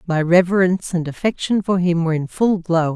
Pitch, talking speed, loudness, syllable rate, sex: 175 Hz, 205 wpm, -18 LUFS, 5.6 syllables/s, female